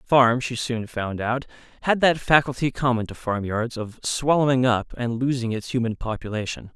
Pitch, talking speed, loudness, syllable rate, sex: 120 Hz, 180 wpm, -23 LUFS, 5.0 syllables/s, male